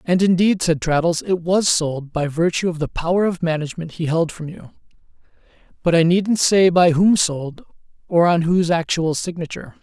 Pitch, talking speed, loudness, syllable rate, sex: 170 Hz, 185 wpm, -18 LUFS, 5.1 syllables/s, male